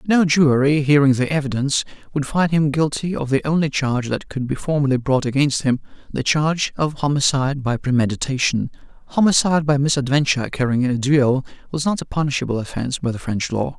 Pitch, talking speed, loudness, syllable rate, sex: 140 Hz, 180 wpm, -19 LUFS, 6.1 syllables/s, male